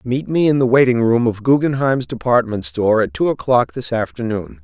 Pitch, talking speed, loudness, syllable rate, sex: 115 Hz, 195 wpm, -17 LUFS, 5.3 syllables/s, male